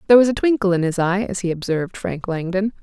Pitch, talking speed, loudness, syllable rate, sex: 190 Hz, 255 wpm, -20 LUFS, 6.7 syllables/s, female